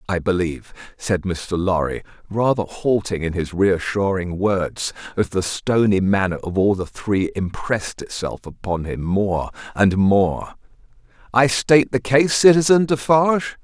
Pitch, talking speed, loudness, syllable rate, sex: 105 Hz, 140 wpm, -19 LUFS, 4.3 syllables/s, male